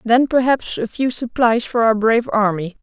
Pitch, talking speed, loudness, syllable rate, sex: 230 Hz, 190 wpm, -17 LUFS, 4.9 syllables/s, female